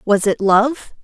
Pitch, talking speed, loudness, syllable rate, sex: 220 Hz, 175 wpm, -16 LUFS, 3.5 syllables/s, female